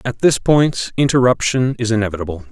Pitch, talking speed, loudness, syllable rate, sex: 120 Hz, 145 wpm, -16 LUFS, 5.6 syllables/s, male